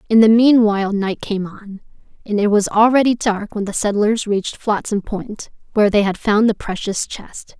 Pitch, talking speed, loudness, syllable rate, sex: 210 Hz, 190 wpm, -17 LUFS, 4.9 syllables/s, female